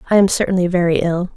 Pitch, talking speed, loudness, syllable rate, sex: 180 Hz, 220 wpm, -16 LUFS, 7.3 syllables/s, female